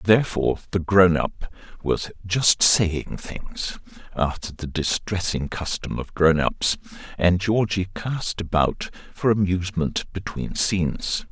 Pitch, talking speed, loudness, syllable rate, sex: 90 Hz, 120 wpm, -23 LUFS, 3.9 syllables/s, male